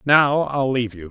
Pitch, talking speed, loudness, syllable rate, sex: 130 Hz, 215 wpm, -19 LUFS, 5.2 syllables/s, male